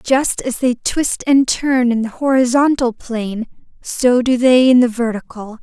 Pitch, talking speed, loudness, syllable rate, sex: 245 Hz, 170 wpm, -15 LUFS, 4.2 syllables/s, female